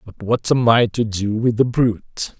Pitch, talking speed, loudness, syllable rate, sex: 115 Hz, 225 wpm, -18 LUFS, 4.5 syllables/s, male